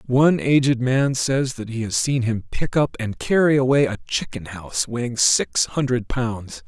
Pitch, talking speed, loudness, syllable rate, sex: 125 Hz, 190 wpm, -21 LUFS, 4.6 syllables/s, male